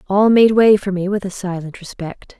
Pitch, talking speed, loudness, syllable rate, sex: 195 Hz, 225 wpm, -15 LUFS, 4.9 syllables/s, female